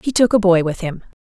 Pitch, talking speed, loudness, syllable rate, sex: 190 Hz, 295 wpm, -16 LUFS, 6.3 syllables/s, female